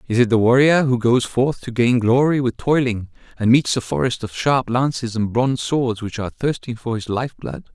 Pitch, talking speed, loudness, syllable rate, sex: 120 Hz, 225 wpm, -19 LUFS, 5.1 syllables/s, male